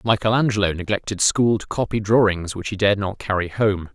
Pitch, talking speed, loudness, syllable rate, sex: 105 Hz, 200 wpm, -20 LUFS, 5.7 syllables/s, male